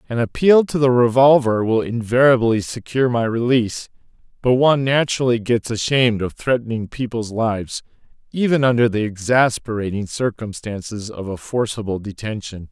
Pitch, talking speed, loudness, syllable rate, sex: 115 Hz, 130 wpm, -18 LUFS, 5.3 syllables/s, male